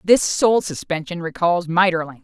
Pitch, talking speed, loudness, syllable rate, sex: 175 Hz, 135 wpm, -19 LUFS, 4.7 syllables/s, female